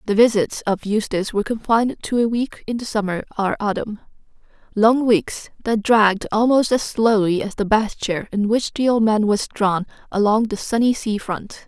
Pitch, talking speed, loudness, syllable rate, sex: 215 Hz, 190 wpm, -19 LUFS, 5.1 syllables/s, female